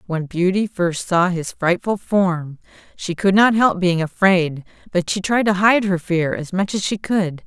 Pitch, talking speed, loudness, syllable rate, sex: 185 Hz, 200 wpm, -18 LUFS, 4.2 syllables/s, female